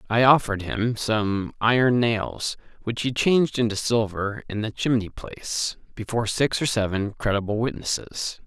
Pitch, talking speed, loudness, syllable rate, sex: 110 Hz, 150 wpm, -24 LUFS, 4.7 syllables/s, male